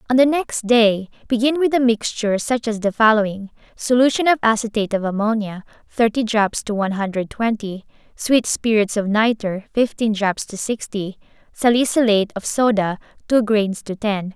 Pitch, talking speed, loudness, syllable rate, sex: 220 Hz, 160 wpm, -19 LUFS, 5.1 syllables/s, female